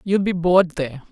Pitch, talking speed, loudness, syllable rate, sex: 170 Hz, 215 wpm, -19 LUFS, 6.3 syllables/s, female